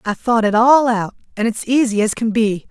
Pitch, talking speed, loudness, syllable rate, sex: 225 Hz, 245 wpm, -16 LUFS, 5.5 syllables/s, male